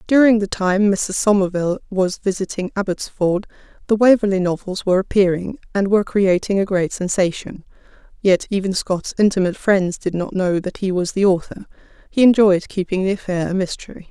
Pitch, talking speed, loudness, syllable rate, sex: 190 Hz, 165 wpm, -18 LUFS, 5.5 syllables/s, female